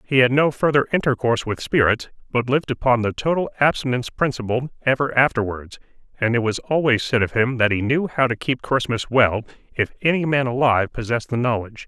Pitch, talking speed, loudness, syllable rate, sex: 125 Hz, 190 wpm, -20 LUFS, 6.0 syllables/s, male